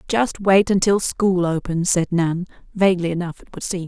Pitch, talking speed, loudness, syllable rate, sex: 180 Hz, 170 wpm, -19 LUFS, 5.0 syllables/s, female